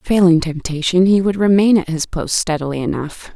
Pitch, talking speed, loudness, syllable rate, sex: 175 Hz, 180 wpm, -16 LUFS, 5.1 syllables/s, female